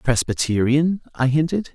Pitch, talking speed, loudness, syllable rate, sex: 140 Hz, 105 wpm, -20 LUFS, 4.6 syllables/s, male